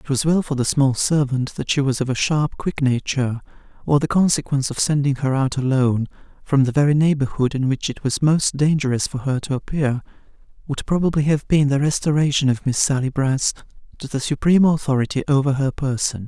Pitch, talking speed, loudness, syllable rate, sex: 140 Hz, 200 wpm, -20 LUFS, 5.7 syllables/s, male